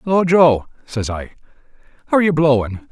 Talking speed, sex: 165 wpm, male